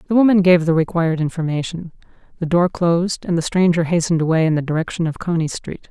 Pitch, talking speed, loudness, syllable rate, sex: 170 Hz, 205 wpm, -18 LUFS, 6.5 syllables/s, female